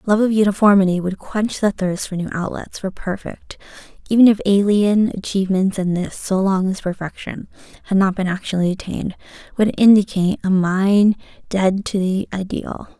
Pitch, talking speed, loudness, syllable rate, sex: 195 Hz, 160 wpm, -18 LUFS, 5.3 syllables/s, female